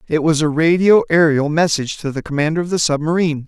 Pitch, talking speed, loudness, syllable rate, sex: 155 Hz, 205 wpm, -16 LUFS, 6.5 syllables/s, male